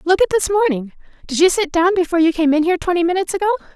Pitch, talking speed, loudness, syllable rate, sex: 350 Hz, 240 wpm, -17 LUFS, 8.7 syllables/s, female